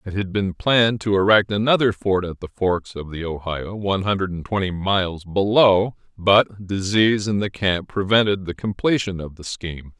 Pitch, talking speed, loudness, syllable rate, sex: 95 Hz, 185 wpm, -20 LUFS, 5.1 syllables/s, male